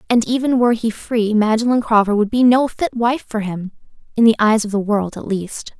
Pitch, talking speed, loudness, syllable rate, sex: 225 Hz, 215 wpm, -17 LUFS, 5.3 syllables/s, female